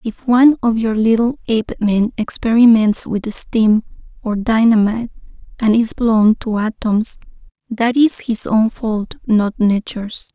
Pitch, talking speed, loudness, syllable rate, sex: 225 Hz, 135 wpm, -16 LUFS, 4.2 syllables/s, female